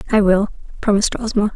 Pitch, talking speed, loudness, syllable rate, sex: 205 Hz, 155 wpm, -18 LUFS, 7.1 syllables/s, female